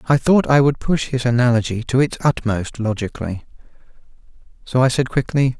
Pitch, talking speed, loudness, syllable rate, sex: 125 Hz, 160 wpm, -18 LUFS, 5.4 syllables/s, male